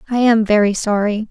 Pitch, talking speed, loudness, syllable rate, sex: 215 Hz, 185 wpm, -15 LUFS, 5.5 syllables/s, female